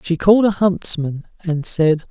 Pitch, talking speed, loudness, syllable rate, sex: 175 Hz, 170 wpm, -17 LUFS, 4.6 syllables/s, male